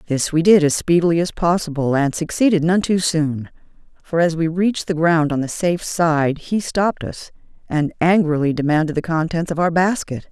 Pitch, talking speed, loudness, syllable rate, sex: 165 Hz, 190 wpm, -18 LUFS, 5.2 syllables/s, female